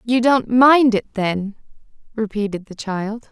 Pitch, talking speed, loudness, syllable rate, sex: 220 Hz, 145 wpm, -18 LUFS, 3.9 syllables/s, female